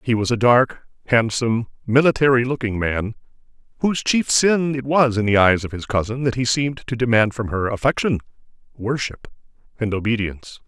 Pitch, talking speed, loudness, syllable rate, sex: 120 Hz, 170 wpm, -19 LUFS, 5.5 syllables/s, male